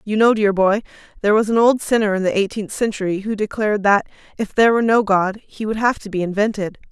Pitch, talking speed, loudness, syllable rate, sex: 210 Hz, 235 wpm, -18 LUFS, 6.4 syllables/s, female